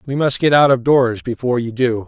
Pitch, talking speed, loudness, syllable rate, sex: 125 Hz, 260 wpm, -16 LUFS, 5.7 syllables/s, male